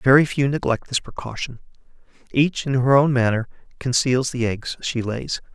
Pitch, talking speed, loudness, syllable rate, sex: 130 Hz, 160 wpm, -21 LUFS, 4.8 syllables/s, male